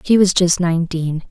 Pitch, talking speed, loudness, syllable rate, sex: 175 Hz, 185 wpm, -16 LUFS, 5.2 syllables/s, female